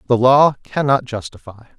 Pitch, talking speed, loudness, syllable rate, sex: 125 Hz, 135 wpm, -15 LUFS, 4.7 syllables/s, male